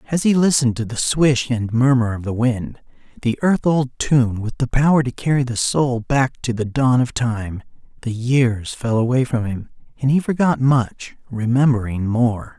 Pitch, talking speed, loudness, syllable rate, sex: 125 Hz, 190 wpm, -19 LUFS, 4.6 syllables/s, male